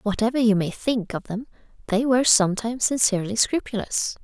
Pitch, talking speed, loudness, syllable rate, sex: 225 Hz, 155 wpm, -22 LUFS, 6.0 syllables/s, female